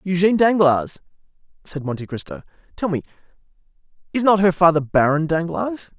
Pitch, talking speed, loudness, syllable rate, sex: 165 Hz, 130 wpm, -19 LUFS, 5.6 syllables/s, male